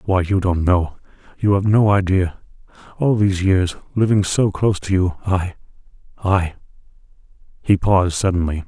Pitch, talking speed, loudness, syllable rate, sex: 95 Hz, 120 wpm, -18 LUFS, 5.0 syllables/s, male